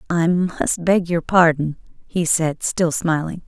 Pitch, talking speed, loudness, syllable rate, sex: 165 Hz, 155 wpm, -19 LUFS, 3.7 syllables/s, female